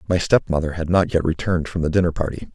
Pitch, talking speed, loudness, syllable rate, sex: 85 Hz, 235 wpm, -20 LUFS, 6.7 syllables/s, male